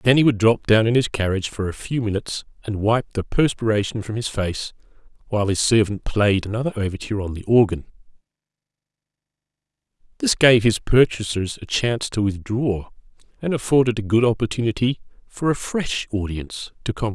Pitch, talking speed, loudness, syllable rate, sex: 110 Hz, 165 wpm, -21 LUFS, 5.9 syllables/s, male